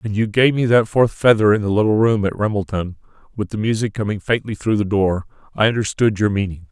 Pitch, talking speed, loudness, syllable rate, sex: 105 Hz, 225 wpm, -18 LUFS, 5.8 syllables/s, male